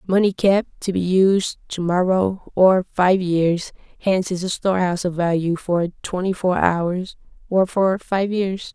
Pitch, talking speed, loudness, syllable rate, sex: 185 Hz, 165 wpm, -20 LUFS, 4.3 syllables/s, female